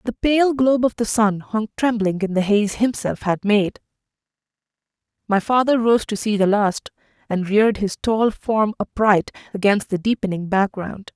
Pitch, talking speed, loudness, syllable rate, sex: 210 Hz, 165 wpm, -19 LUFS, 4.7 syllables/s, female